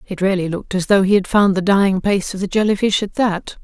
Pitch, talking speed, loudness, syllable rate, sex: 195 Hz, 265 wpm, -17 LUFS, 6.3 syllables/s, female